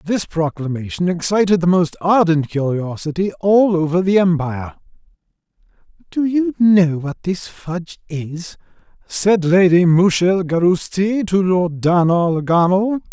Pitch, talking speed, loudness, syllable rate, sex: 175 Hz, 110 wpm, -16 LUFS, 4.1 syllables/s, male